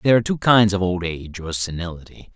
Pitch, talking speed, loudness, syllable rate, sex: 95 Hz, 230 wpm, -20 LUFS, 6.7 syllables/s, male